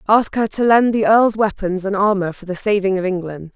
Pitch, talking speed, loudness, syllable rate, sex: 200 Hz, 235 wpm, -17 LUFS, 5.3 syllables/s, female